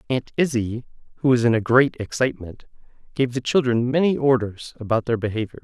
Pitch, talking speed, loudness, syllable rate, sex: 120 Hz, 170 wpm, -21 LUFS, 5.8 syllables/s, male